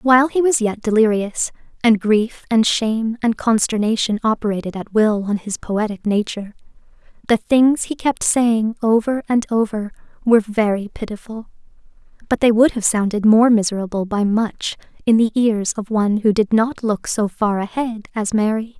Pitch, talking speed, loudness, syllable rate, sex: 220 Hz, 165 wpm, -18 LUFS, 4.9 syllables/s, female